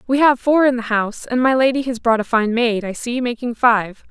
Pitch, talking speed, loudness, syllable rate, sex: 240 Hz, 265 wpm, -17 LUFS, 5.4 syllables/s, female